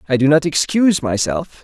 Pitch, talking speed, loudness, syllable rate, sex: 145 Hz, 185 wpm, -16 LUFS, 5.5 syllables/s, male